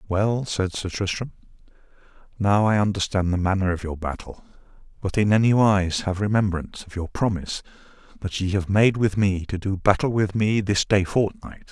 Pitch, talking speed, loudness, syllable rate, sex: 100 Hz, 180 wpm, -23 LUFS, 5.2 syllables/s, male